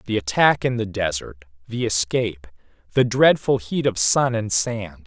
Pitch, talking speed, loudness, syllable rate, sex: 105 Hz, 165 wpm, -20 LUFS, 4.5 syllables/s, male